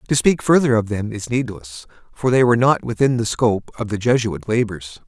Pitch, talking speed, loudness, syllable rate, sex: 115 Hz, 215 wpm, -19 LUFS, 5.5 syllables/s, male